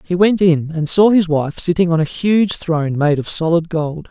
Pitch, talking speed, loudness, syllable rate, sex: 165 Hz, 235 wpm, -16 LUFS, 4.8 syllables/s, male